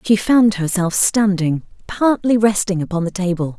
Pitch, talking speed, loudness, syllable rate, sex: 195 Hz, 150 wpm, -17 LUFS, 4.7 syllables/s, female